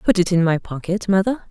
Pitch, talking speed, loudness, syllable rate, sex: 190 Hz, 240 wpm, -19 LUFS, 5.7 syllables/s, female